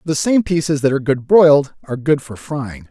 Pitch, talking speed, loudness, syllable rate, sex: 145 Hz, 225 wpm, -16 LUFS, 5.6 syllables/s, male